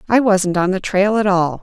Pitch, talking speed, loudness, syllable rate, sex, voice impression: 195 Hz, 260 wpm, -16 LUFS, 4.8 syllables/s, female, feminine, adult-like, tensed, powerful, bright, clear, fluent, intellectual, friendly, reassuring, lively, kind